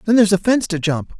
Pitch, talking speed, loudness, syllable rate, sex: 195 Hz, 300 wpm, -17 LUFS, 7.7 syllables/s, male